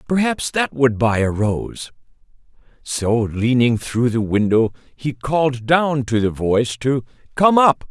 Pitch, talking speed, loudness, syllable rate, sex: 130 Hz, 150 wpm, -18 LUFS, 3.9 syllables/s, male